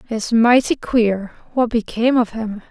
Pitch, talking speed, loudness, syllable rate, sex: 230 Hz, 155 wpm, -18 LUFS, 4.4 syllables/s, female